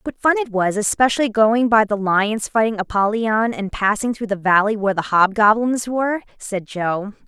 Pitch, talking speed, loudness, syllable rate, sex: 215 Hz, 190 wpm, -18 LUFS, 5.0 syllables/s, female